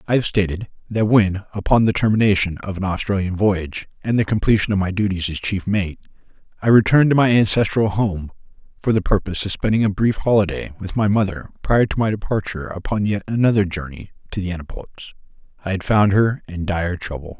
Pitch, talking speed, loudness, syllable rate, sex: 100 Hz, 195 wpm, -19 LUFS, 6.1 syllables/s, male